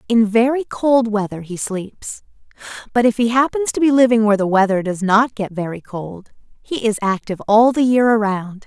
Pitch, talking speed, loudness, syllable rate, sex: 220 Hz, 195 wpm, -17 LUFS, 5.2 syllables/s, female